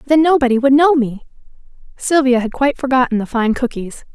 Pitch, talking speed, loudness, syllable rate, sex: 260 Hz, 175 wpm, -15 LUFS, 5.8 syllables/s, female